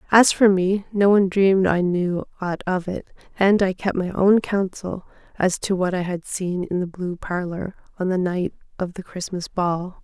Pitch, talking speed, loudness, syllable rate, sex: 185 Hz, 205 wpm, -21 LUFS, 4.6 syllables/s, female